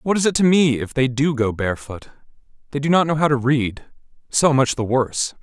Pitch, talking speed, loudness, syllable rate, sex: 140 Hz, 230 wpm, -19 LUFS, 5.5 syllables/s, male